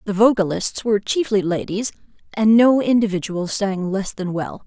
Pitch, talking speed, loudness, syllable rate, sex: 205 Hz, 155 wpm, -19 LUFS, 4.9 syllables/s, female